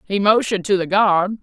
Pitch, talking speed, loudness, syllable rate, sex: 200 Hz, 210 wpm, -17 LUFS, 5.7 syllables/s, female